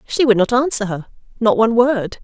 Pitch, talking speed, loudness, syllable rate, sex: 225 Hz, 190 wpm, -16 LUFS, 5.8 syllables/s, female